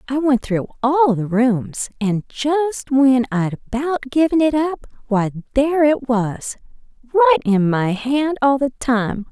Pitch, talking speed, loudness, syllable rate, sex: 255 Hz, 160 wpm, -18 LUFS, 3.8 syllables/s, female